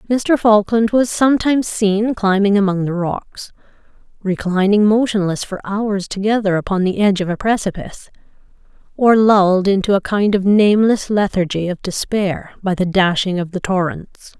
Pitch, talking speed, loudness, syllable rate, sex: 200 Hz, 150 wpm, -16 LUFS, 5.0 syllables/s, female